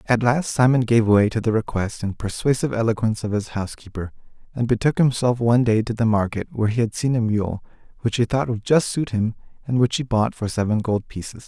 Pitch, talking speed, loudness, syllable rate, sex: 115 Hz, 225 wpm, -21 LUFS, 6.0 syllables/s, male